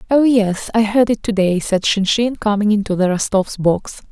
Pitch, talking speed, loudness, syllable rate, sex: 210 Hz, 190 wpm, -16 LUFS, 4.8 syllables/s, female